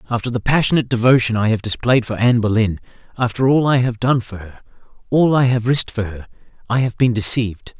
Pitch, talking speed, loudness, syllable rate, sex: 115 Hz, 185 wpm, -17 LUFS, 6.3 syllables/s, male